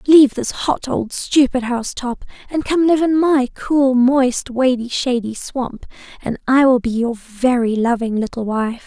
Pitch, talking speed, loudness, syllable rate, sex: 255 Hz, 175 wpm, -17 LUFS, 4.3 syllables/s, female